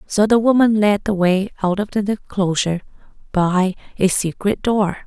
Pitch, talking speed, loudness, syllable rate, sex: 200 Hz, 165 wpm, -18 LUFS, 4.6 syllables/s, female